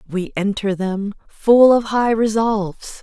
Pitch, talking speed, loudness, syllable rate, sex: 210 Hz, 140 wpm, -17 LUFS, 3.8 syllables/s, female